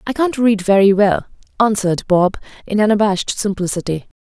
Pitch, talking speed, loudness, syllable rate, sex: 205 Hz, 140 wpm, -16 LUFS, 5.7 syllables/s, female